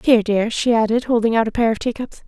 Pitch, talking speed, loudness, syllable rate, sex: 225 Hz, 265 wpm, -18 LUFS, 6.5 syllables/s, female